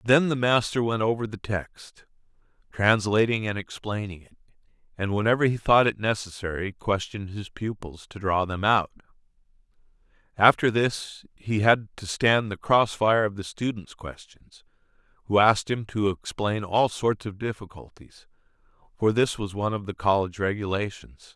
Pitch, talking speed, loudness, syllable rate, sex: 105 Hz, 150 wpm, -25 LUFS, 4.8 syllables/s, male